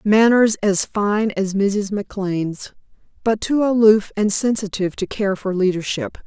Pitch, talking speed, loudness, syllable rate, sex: 205 Hz, 145 wpm, -19 LUFS, 4.5 syllables/s, female